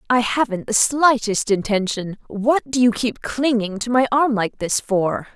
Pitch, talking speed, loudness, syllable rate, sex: 230 Hz, 170 wpm, -19 LUFS, 4.2 syllables/s, female